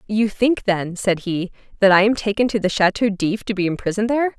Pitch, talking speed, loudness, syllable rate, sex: 205 Hz, 235 wpm, -19 LUFS, 5.9 syllables/s, female